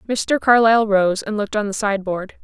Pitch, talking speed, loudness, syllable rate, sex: 210 Hz, 220 wpm, -18 LUFS, 5.4 syllables/s, female